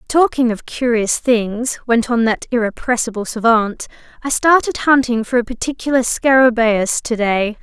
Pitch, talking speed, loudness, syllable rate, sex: 240 Hz, 140 wpm, -16 LUFS, 4.6 syllables/s, female